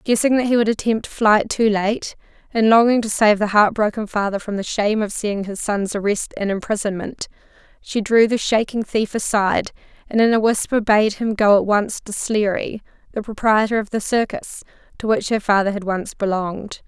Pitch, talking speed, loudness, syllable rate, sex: 210 Hz, 190 wpm, -19 LUFS, 5.2 syllables/s, female